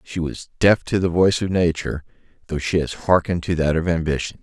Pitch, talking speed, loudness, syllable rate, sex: 85 Hz, 215 wpm, -20 LUFS, 6.1 syllables/s, male